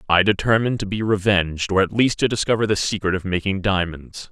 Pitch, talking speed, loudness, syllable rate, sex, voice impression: 100 Hz, 210 wpm, -20 LUFS, 6.1 syllables/s, male, masculine, adult-like, slightly thick, slightly fluent, sincere, slightly friendly